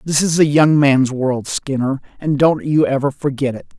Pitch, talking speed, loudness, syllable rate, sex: 140 Hz, 205 wpm, -16 LUFS, 4.7 syllables/s, male